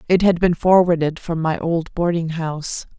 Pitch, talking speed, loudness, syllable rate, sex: 165 Hz, 180 wpm, -19 LUFS, 4.8 syllables/s, female